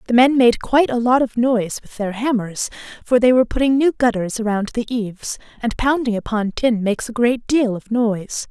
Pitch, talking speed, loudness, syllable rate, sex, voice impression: 235 Hz, 210 wpm, -18 LUFS, 5.5 syllables/s, female, very feminine, young, slightly adult-like, very thin, tensed, slightly powerful, slightly weak, slightly bright, slightly soft, clear, very fluent, slightly raspy, very cute, slightly intellectual, very refreshing, sincere, slightly calm, friendly, reassuring, very unique, elegant, very wild, sweet, lively, slightly kind, very strict, slightly intense, sharp, light